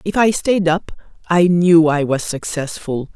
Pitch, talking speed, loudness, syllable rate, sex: 170 Hz, 170 wpm, -16 LUFS, 4.0 syllables/s, female